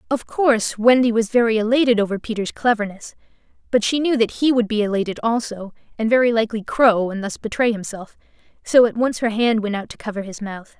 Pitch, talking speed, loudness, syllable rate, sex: 225 Hz, 205 wpm, -19 LUFS, 5.9 syllables/s, female